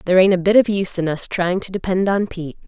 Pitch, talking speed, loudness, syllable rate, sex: 185 Hz, 290 wpm, -18 LUFS, 6.9 syllables/s, female